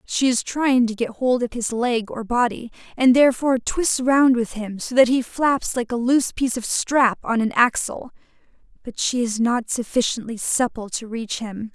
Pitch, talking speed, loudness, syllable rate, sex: 240 Hz, 200 wpm, -20 LUFS, 4.7 syllables/s, female